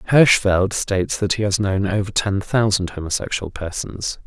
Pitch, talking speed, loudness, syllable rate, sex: 100 Hz, 155 wpm, -20 LUFS, 4.8 syllables/s, male